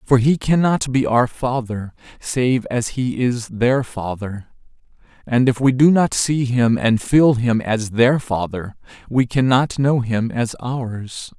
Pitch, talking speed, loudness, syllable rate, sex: 125 Hz, 165 wpm, -18 LUFS, 3.6 syllables/s, male